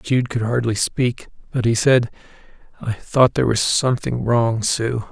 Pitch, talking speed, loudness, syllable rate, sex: 120 Hz, 165 wpm, -19 LUFS, 4.5 syllables/s, male